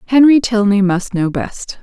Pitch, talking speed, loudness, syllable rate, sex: 210 Hz, 165 wpm, -14 LUFS, 4.2 syllables/s, female